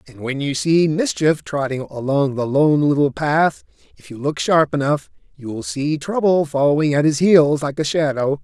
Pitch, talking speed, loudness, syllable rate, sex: 145 Hz, 185 wpm, -18 LUFS, 4.6 syllables/s, male